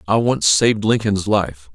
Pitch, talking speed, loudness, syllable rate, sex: 100 Hz, 170 wpm, -17 LUFS, 4.5 syllables/s, male